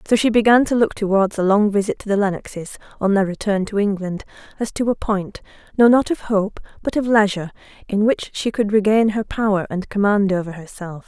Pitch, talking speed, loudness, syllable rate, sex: 205 Hz, 200 wpm, -19 LUFS, 5.7 syllables/s, female